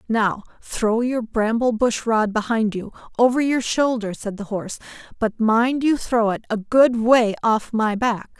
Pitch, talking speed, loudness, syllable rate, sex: 225 Hz, 180 wpm, -20 LUFS, 4.2 syllables/s, female